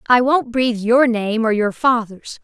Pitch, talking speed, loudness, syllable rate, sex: 235 Hz, 195 wpm, -17 LUFS, 4.4 syllables/s, female